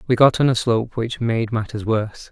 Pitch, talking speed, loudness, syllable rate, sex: 115 Hz, 235 wpm, -20 LUFS, 5.6 syllables/s, male